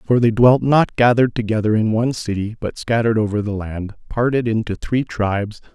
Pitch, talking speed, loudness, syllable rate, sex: 110 Hz, 190 wpm, -18 LUFS, 5.6 syllables/s, male